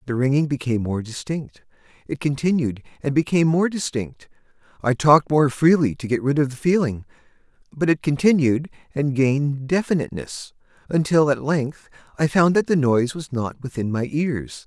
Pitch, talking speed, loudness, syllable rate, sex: 140 Hz, 155 wpm, -21 LUFS, 5.3 syllables/s, male